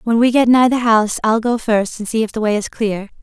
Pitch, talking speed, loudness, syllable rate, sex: 225 Hz, 300 wpm, -16 LUFS, 5.7 syllables/s, female